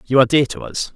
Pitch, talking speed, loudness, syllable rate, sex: 120 Hz, 315 wpm, -17 LUFS, 7.1 syllables/s, male